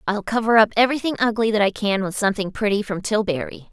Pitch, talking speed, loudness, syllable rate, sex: 210 Hz, 210 wpm, -20 LUFS, 6.7 syllables/s, female